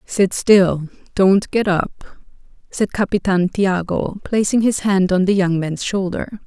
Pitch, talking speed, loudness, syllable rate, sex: 190 Hz, 150 wpm, -17 LUFS, 3.6 syllables/s, female